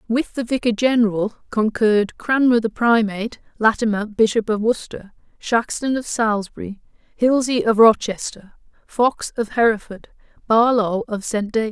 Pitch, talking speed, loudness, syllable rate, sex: 220 Hz, 130 wpm, -19 LUFS, 4.9 syllables/s, female